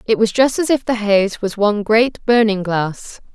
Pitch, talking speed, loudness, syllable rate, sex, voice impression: 215 Hz, 215 wpm, -16 LUFS, 4.5 syllables/s, female, very feminine, very adult-like, thin, slightly tensed, slightly weak, slightly bright, soft, clear, fluent, cool, very intellectual, refreshing, very sincere, calm, friendly, very reassuring, unique, very elegant, slightly wild, sweet, slightly lively, kind, slightly intense